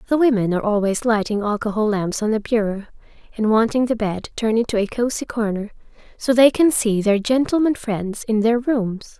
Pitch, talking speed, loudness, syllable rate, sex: 225 Hz, 190 wpm, -19 LUFS, 5.4 syllables/s, female